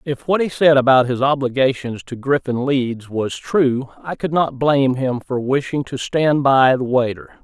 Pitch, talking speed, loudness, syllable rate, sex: 135 Hz, 195 wpm, -18 LUFS, 4.4 syllables/s, male